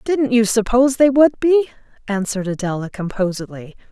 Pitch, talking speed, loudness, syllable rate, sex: 230 Hz, 140 wpm, -17 LUFS, 5.6 syllables/s, female